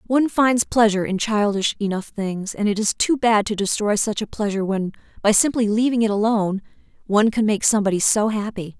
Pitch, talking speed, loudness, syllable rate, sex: 210 Hz, 200 wpm, -20 LUFS, 5.9 syllables/s, female